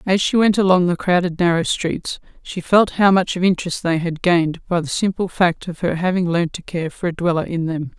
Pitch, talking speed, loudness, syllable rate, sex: 175 Hz, 240 wpm, -18 LUFS, 5.4 syllables/s, female